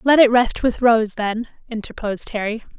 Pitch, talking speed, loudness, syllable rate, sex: 230 Hz, 170 wpm, -19 LUFS, 5.0 syllables/s, female